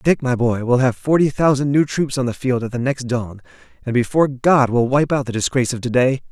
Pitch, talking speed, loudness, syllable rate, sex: 130 Hz, 245 wpm, -18 LUFS, 5.7 syllables/s, male